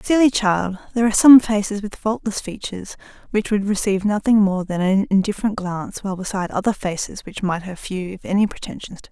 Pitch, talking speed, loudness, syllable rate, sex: 200 Hz, 205 wpm, -19 LUFS, 6.4 syllables/s, female